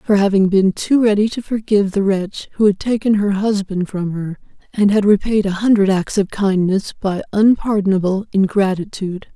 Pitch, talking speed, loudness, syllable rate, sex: 200 Hz, 175 wpm, -17 LUFS, 5.2 syllables/s, female